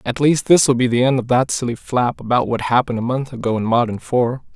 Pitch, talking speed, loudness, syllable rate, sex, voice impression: 125 Hz, 250 wpm, -18 LUFS, 5.7 syllables/s, male, masculine, adult-like, slightly cool, sincere, calm, slightly sweet, kind